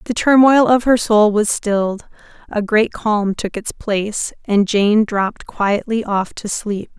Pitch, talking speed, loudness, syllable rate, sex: 215 Hz, 170 wpm, -16 LUFS, 4.0 syllables/s, female